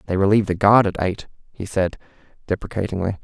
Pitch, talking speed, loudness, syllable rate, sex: 100 Hz, 165 wpm, -20 LUFS, 6.5 syllables/s, male